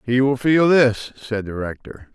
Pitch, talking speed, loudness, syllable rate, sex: 120 Hz, 195 wpm, -18 LUFS, 4.3 syllables/s, male